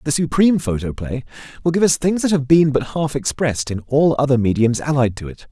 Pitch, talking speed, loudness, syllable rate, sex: 140 Hz, 220 wpm, -18 LUFS, 5.8 syllables/s, male